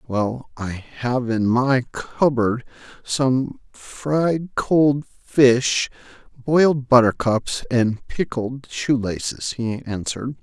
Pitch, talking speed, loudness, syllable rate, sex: 125 Hz, 90 wpm, -21 LUFS, 2.9 syllables/s, male